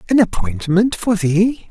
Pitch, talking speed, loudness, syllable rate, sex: 195 Hz, 140 wpm, -17 LUFS, 4.0 syllables/s, male